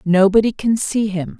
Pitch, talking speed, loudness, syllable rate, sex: 205 Hz, 170 wpm, -17 LUFS, 4.7 syllables/s, female